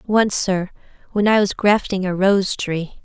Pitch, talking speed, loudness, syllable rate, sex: 195 Hz, 180 wpm, -18 LUFS, 4.1 syllables/s, female